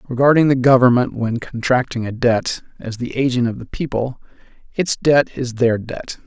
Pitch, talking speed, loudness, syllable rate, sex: 125 Hz, 170 wpm, -18 LUFS, 4.8 syllables/s, male